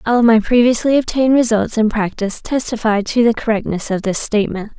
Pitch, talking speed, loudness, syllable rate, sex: 225 Hz, 175 wpm, -16 LUFS, 5.8 syllables/s, female